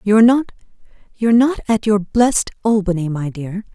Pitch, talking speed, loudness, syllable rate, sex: 210 Hz, 145 wpm, -16 LUFS, 5.1 syllables/s, female